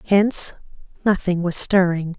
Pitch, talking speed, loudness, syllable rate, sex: 185 Hz, 110 wpm, -19 LUFS, 4.5 syllables/s, female